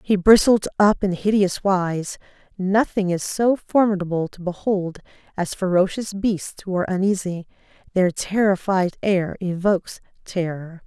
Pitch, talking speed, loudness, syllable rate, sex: 190 Hz, 125 wpm, -21 LUFS, 4.5 syllables/s, female